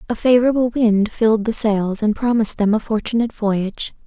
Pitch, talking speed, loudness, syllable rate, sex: 220 Hz, 175 wpm, -18 LUFS, 5.8 syllables/s, female